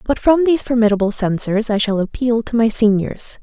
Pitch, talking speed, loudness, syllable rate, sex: 225 Hz, 195 wpm, -16 LUFS, 5.4 syllables/s, female